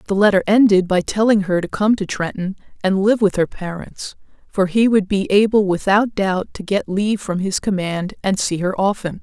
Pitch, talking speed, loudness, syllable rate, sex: 195 Hz, 210 wpm, -18 LUFS, 5.0 syllables/s, female